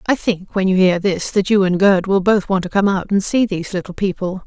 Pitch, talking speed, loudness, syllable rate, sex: 190 Hz, 280 wpm, -17 LUFS, 5.5 syllables/s, female